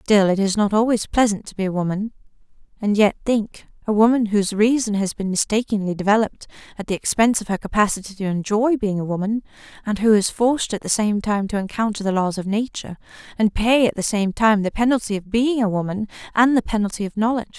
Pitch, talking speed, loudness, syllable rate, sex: 210 Hz, 210 wpm, -20 LUFS, 6.2 syllables/s, female